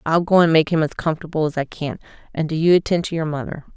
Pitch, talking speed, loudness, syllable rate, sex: 160 Hz, 270 wpm, -19 LUFS, 6.9 syllables/s, female